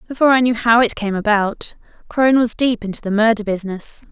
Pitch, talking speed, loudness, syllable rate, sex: 225 Hz, 205 wpm, -17 LUFS, 6.1 syllables/s, female